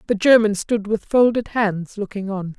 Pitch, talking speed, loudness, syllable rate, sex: 210 Hz, 185 wpm, -19 LUFS, 4.6 syllables/s, female